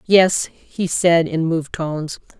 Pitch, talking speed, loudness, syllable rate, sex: 165 Hz, 150 wpm, -19 LUFS, 3.9 syllables/s, female